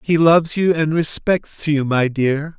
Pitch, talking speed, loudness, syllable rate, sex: 155 Hz, 185 wpm, -17 LUFS, 4.0 syllables/s, male